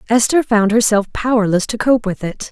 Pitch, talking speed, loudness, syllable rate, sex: 220 Hz, 190 wpm, -15 LUFS, 5.2 syllables/s, female